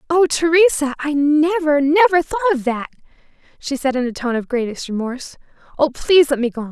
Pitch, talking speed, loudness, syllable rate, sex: 290 Hz, 195 wpm, -17 LUFS, 5.8 syllables/s, female